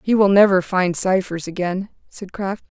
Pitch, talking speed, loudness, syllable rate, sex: 190 Hz, 170 wpm, -19 LUFS, 4.6 syllables/s, female